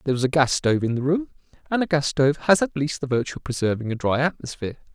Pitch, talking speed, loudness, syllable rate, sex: 145 Hz, 265 wpm, -23 LUFS, 7.2 syllables/s, male